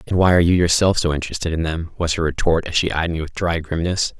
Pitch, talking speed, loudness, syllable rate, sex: 85 Hz, 270 wpm, -19 LUFS, 6.6 syllables/s, male